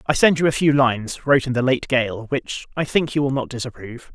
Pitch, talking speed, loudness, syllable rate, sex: 130 Hz, 260 wpm, -20 LUFS, 5.9 syllables/s, male